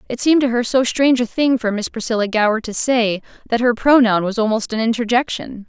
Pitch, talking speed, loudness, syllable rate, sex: 235 Hz, 220 wpm, -17 LUFS, 6.0 syllables/s, female